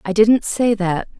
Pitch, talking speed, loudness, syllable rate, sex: 205 Hz, 200 wpm, -17 LUFS, 4.0 syllables/s, female